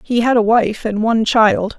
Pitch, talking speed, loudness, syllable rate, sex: 225 Hz, 235 wpm, -15 LUFS, 4.7 syllables/s, female